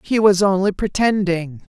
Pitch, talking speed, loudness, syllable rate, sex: 190 Hz, 135 wpm, -18 LUFS, 4.5 syllables/s, female